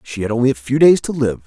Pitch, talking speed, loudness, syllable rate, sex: 125 Hz, 325 wpm, -16 LUFS, 6.7 syllables/s, male